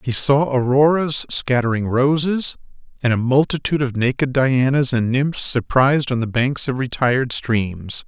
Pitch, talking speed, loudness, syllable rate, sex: 130 Hz, 150 wpm, -18 LUFS, 4.5 syllables/s, male